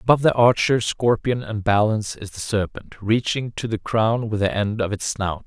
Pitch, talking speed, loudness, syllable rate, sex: 110 Hz, 210 wpm, -21 LUFS, 5.0 syllables/s, male